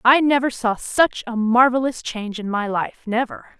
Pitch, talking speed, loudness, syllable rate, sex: 240 Hz, 185 wpm, -20 LUFS, 4.7 syllables/s, female